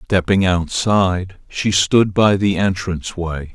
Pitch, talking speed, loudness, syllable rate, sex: 95 Hz, 135 wpm, -17 LUFS, 3.9 syllables/s, male